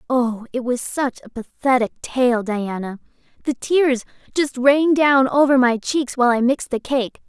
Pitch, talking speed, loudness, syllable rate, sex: 255 Hz, 175 wpm, -19 LUFS, 4.6 syllables/s, female